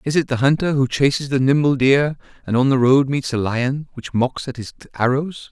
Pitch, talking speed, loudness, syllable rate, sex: 135 Hz, 230 wpm, -18 LUFS, 5.2 syllables/s, male